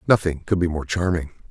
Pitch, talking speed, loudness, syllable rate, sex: 85 Hz, 200 wpm, -23 LUFS, 6.0 syllables/s, male